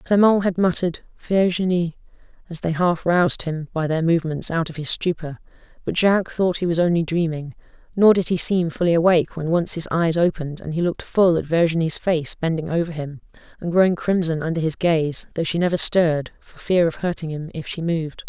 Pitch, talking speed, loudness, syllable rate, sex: 170 Hz, 205 wpm, -20 LUFS, 5.7 syllables/s, female